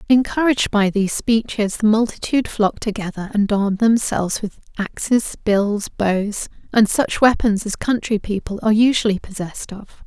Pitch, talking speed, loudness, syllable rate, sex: 215 Hz, 150 wpm, -19 LUFS, 5.1 syllables/s, female